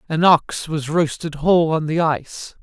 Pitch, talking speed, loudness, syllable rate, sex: 160 Hz, 185 wpm, -19 LUFS, 4.6 syllables/s, male